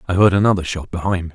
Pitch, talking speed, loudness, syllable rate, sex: 90 Hz, 270 wpm, -18 LUFS, 7.8 syllables/s, male